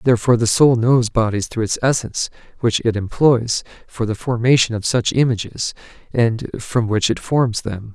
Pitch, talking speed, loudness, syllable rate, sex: 115 Hz, 175 wpm, -18 LUFS, 5.0 syllables/s, male